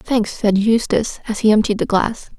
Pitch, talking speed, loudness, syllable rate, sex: 215 Hz, 200 wpm, -17 LUFS, 5.0 syllables/s, female